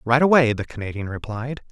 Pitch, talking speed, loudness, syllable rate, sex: 125 Hz, 175 wpm, -21 LUFS, 5.7 syllables/s, male